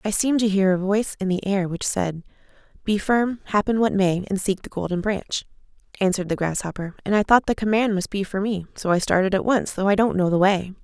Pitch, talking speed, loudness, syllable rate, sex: 195 Hz, 245 wpm, -22 LUFS, 5.9 syllables/s, female